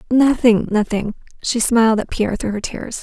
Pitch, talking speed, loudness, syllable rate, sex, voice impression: 225 Hz, 180 wpm, -17 LUFS, 5.2 syllables/s, female, feminine, adult-like, slightly relaxed, powerful, clear, fluent, intellectual, calm, elegant, lively, slightly modest